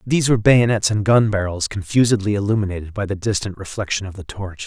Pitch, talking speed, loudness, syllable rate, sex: 105 Hz, 195 wpm, -19 LUFS, 6.4 syllables/s, male